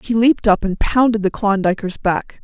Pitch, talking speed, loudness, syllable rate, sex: 210 Hz, 195 wpm, -17 LUFS, 5.2 syllables/s, female